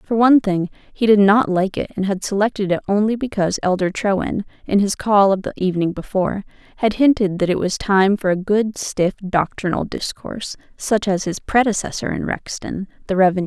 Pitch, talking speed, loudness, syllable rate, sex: 200 Hz, 190 wpm, -19 LUFS, 5.3 syllables/s, female